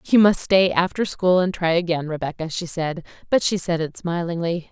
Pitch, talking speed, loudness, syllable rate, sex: 175 Hz, 205 wpm, -21 LUFS, 5.1 syllables/s, female